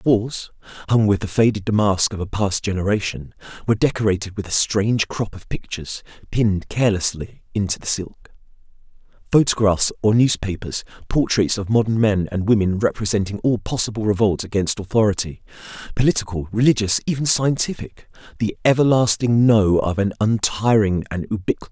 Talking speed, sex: 140 wpm, male